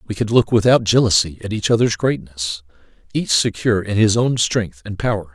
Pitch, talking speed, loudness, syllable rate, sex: 105 Hz, 190 wpm, -18 LUFS, 5.4 syllables/s, male